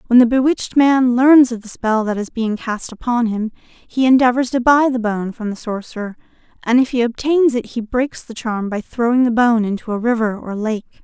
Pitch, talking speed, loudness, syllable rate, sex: 235 Hz, 225 wpm, -17 LUFS, 5.1 syllables/s, female